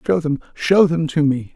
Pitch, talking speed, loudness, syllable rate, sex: 155 Hz, 195 wpm, -18 LUFS, 4.6 syllables/s, male